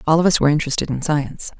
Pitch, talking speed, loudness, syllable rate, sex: 150 Hz, 265 wpm, -18 LUFS, 8.5 syllables/s, female